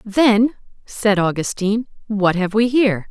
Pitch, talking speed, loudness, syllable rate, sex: 210 Hz, 135 wpm, -18 LUFS, 4.5 syllables/s, female